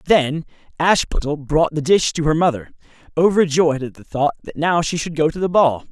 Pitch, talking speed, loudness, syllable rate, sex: 155 Hz, 205 wpm, -18 LUFS, 5.2 syllables/s, male